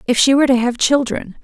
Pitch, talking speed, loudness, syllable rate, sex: 255 Hz, 250 wpm, -15 LUFS, 6.6 syllables/s, female